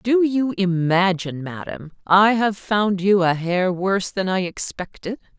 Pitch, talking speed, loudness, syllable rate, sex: 190 Hz, 155 wpm, -20 LUFS, 4.2 syllables/s, female